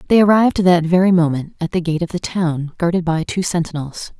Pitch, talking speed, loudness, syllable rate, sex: 170 Hz, 215 wpm, -17 LUFS, 5.7 syllables/s, female